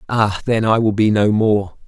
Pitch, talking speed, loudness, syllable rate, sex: 105 Hz, 225 wpm, -16 LUFS, 4.5 syllables/s, male